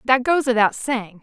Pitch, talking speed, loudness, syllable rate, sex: 240 Hz, 195 wpm, -19 LUFS, 4.4 syllables/s, female